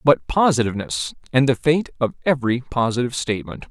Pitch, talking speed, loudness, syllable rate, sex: 125 Hz, 145 wpm, -20 LUFS, 6.2 syllables/s, male